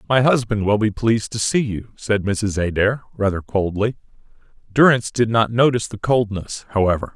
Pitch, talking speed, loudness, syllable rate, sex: 110 Hz, 170 wpm, -19 LUFS, 5.4 syllables/s, male